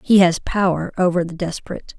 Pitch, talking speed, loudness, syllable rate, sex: 180 Hz, 180 wpm, -19 LUFS, 6.0 syllables/s, female